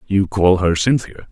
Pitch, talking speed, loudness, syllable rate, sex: 95 Hz, 180 wpm, -16 LUFS, 4.9 syllables/s, male